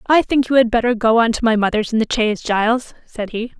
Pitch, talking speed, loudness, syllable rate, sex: 230 Hz, 265 wpm, -17 LUFS, 6.1 syllables/s, female